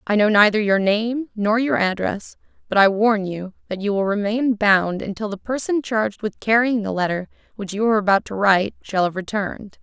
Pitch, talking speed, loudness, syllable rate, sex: 210 Hz, 210 wpm, -20 LUFS, 5.3 syllables/s, female